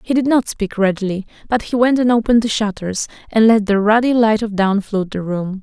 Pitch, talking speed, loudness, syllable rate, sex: 215 Hz, 235 wpm, -16 LUFS, 5.5 syllables/s, female